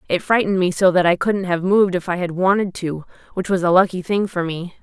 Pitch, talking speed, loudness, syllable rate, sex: 185 Hz, 260 wpm, -18 LUFS, 6.0 syllables/s, female